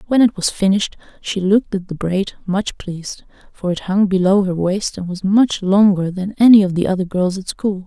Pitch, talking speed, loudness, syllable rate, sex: 190 Hz, 215 wpm, -17 LUFS, 5.2 syllables/s, female